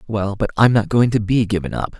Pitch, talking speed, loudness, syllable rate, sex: 105 Hz, 270 wpm, -18 LUFS, 5.8 syllables/s, male